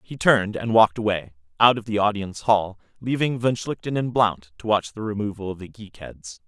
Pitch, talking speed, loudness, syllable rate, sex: 105 Hz, 215 wpm, -22 LUFS, 5.5 syllables/s, male